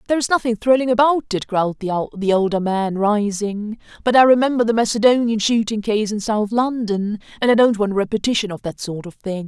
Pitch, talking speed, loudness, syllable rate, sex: 220 Hz, 205 wpm, -18 LUFS, 5.6 syllables/s, female